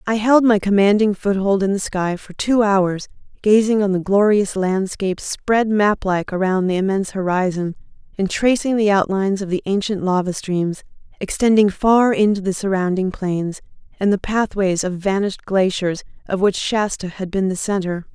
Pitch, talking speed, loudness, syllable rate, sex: 195 Hz, 165 wpm, -18 LUFS, 5.0 syllables/s, female